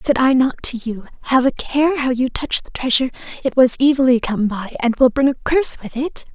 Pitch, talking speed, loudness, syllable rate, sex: 260 Hz, 235 wpm, -17 LUFS, 5.6 syllables/s, female